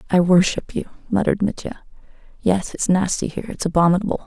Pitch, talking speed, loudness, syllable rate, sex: 185 Hz, 155 wpm, -20 LUFS, 6.3 syllables/s, female